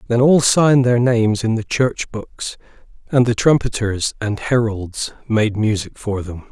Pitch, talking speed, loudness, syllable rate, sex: 115 Hz, 165 wpm, -18 LUFS, 4.3 syllables/s, male